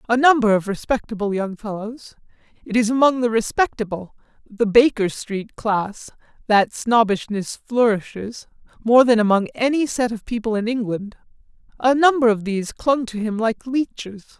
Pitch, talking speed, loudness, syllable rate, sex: 225 Hz, 145 wpm, -20 LUFS, 4.7 syllables/s, male